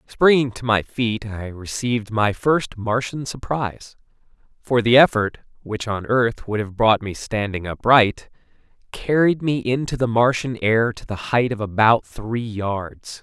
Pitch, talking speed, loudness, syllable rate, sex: 115 Hz, 160 wpm, -20 LUFS, 4.2 syllables/s, male